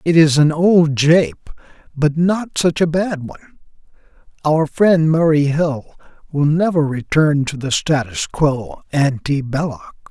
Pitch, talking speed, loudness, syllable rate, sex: 155 Hz, 140 wpm, -16 LUFS, 3.8 syllables/s, male